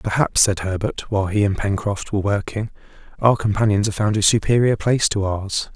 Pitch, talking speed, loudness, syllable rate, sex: 105 Hz, 190 wpm, -19 LUFS, 5.5 syllables/s, male